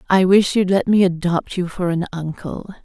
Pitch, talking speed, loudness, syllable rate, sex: 180 Hz, 210 wpm, -18 LUFS, 4.8 syllables/s, female